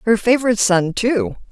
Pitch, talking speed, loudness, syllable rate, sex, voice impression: 225 Hz, 160 wpm, -17 LUFS, 5.7 syllables/s, female, very feminine, slightly young, slightly adult-like, thin, slightly relaxed, weak, bright, soft, clear, fluent, cute, slightly cool, very intellectual, very refreshing, very sincere, calm, very friendly, very reassuring, very unique, very elegant, sweet, very kind, slightly modest, light